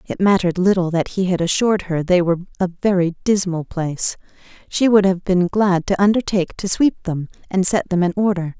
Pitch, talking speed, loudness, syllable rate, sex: 185 Hz, 200 wpm, -18 LUFS, 5.7 syllables/s, female